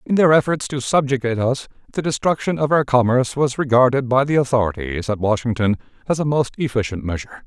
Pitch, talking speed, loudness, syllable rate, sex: 125 Hz, 185 wpm, -19 LUFS, 6.2 syllables/s, male